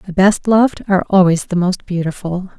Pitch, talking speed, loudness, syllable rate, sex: 185 Hz, 185 wpm, -15 LUFS, 5.6 syllables/s, female